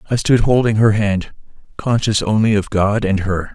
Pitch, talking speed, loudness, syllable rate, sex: 105 Hz, 185 wpm, -16 LUFS, 4.9 syllables/s, male